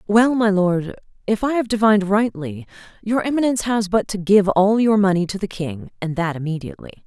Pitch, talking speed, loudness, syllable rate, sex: 200 Hz, 195 wpm, -19 LUFS, 5.5 syllables/s, female